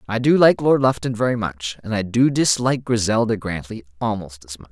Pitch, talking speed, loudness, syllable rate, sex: 110 Hz, 205 wpm, -19 LUFS, 5.5 syllables/s, male